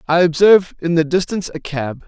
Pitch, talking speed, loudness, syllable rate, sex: 165 Hz, 205 wpm, -16 LUFS, 6.0 syllables/s, male